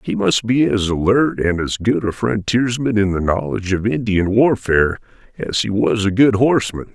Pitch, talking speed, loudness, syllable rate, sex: 105 Hz, 190 wpm, -17 LUFS, 5.0 syllables/s, male